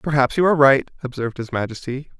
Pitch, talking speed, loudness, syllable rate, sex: 135 Hz, 190 wpm, -19 LUFS, 6.9 syllables/s, male